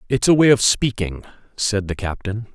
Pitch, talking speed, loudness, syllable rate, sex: 110 Hz, 190 wpm, -19 LUFS, 4.9 syllables/s, male